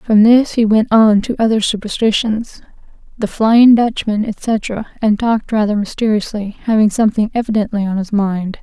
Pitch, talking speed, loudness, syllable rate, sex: 215 Hz, 155 wpm, -14 LUFS, 5.0 syllables/s, female